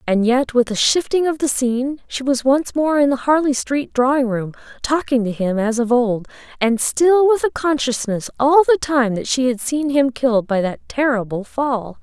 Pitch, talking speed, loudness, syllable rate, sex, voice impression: 260 Hz, 210 wpm, -18 LUFS, 4.7 syllables/s, female, very feminine, young, thin, tensed, slightly powerful, slightly bright, soft, very clear, fluent, slightly raspy, very cute, slightly cool, very intellectual, very refreshing, sincere, calm, very friendly, very reassuring, very unique, very elegant, wild, very sweet, very lively, kind, intense, slightly sharp, light